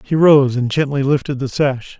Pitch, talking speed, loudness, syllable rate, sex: 140 Hz, 210 wpm, -16 LUFS, 4.8 syllables/s, male